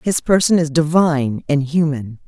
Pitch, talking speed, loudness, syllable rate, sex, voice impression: 150 Hz, 160 wpm, -17 LUFS, 4.9 syllables/s, female, very feminine, very middle-aged, thin, slightly relaxed, powerful, bright, soft, clear, fluent, slightly cute, cool, very intellectual, refreshing, very sincere, very calm, friendly, reassuring, very unique, slightly wild, sweet, lively, kind, modest